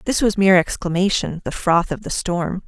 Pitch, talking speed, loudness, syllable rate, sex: 180 Hz, 180 wpm, -19 LUFS, 5.2 syllables/s, female